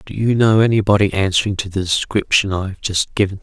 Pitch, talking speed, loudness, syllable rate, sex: 100 Hz, 210 wpm, -17 LUFS, 6.0 syllables/s, male